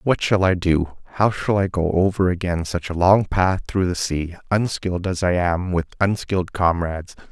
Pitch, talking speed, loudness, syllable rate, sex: 90 Hz, 195 wpm, -21 LUFS, 4.9 syllables/s, male